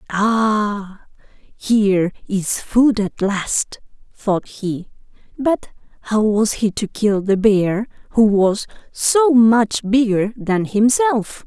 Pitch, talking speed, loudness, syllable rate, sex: 215 Hz, 120 wpm, -17 LUFS, 2.9 syllables/s, female